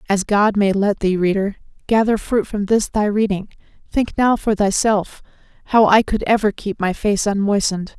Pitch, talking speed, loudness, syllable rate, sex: 205 Hz, 180 wpm, -18 LUFS, 4.8 syllables/s, female